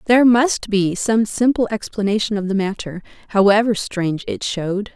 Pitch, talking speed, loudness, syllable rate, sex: 210 Hz, 155 wpm, -18 LUFS, 5.2 syllables/s, female